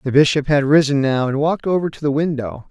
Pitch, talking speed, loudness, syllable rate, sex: 145 Hz, 245 wpm, -17 LUFS, 6.1 syllables/s, male